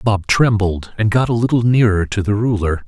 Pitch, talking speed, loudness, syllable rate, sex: 105 Hz, 210 wpm, -16 LUFS, 5.1 syllables/s, male